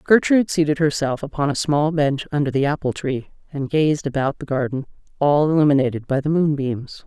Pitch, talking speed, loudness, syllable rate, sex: 145 Hz, 180 wpm, -20 LUFS, 5.5 syllables/s, female